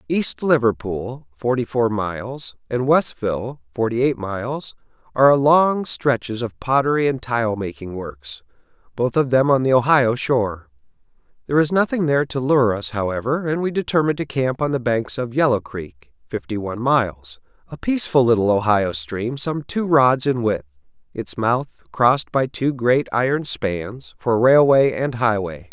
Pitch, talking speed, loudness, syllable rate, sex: 120 Hz, 165 wpm, -20 LUFS, 4.4 syllables/s, male